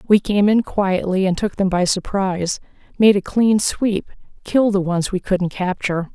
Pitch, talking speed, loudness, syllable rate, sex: 195 Hz, 175 wpm, -18 LUFS, 4.8 syllables/s, female